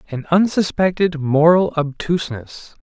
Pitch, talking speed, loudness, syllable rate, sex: 165 Hz, 85 wpm, -17 LUFS, 4.5 syllables/s, male